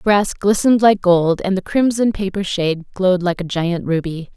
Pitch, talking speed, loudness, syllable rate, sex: 190 Hz, 205 wpm, -17 LUFS, 5.2 syllables/s, female